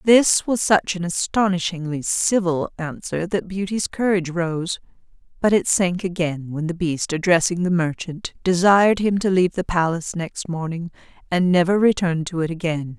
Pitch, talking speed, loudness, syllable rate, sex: 175 Hz, 160 wpm, -21 LUFS, 4.9 syllables/s, female